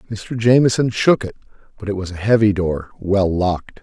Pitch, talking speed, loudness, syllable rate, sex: 105 Hz, 190 wpm, -18 LUFS, 5.2 syllables/s, male